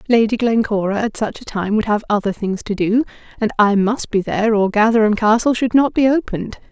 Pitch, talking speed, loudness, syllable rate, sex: 220 Hz, 215 wpm, -17 LUFS, 5.7 syllables/s, female